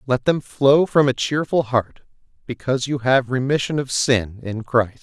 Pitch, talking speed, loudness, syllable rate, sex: 130 Hz, 180 wpm, -20 LUFS, 4.5 syllables/s, male